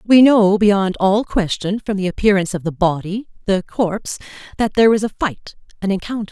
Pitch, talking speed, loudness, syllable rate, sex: 200 Hz, 170 wpm, -17 LUFS, 5.4 syllables/s, female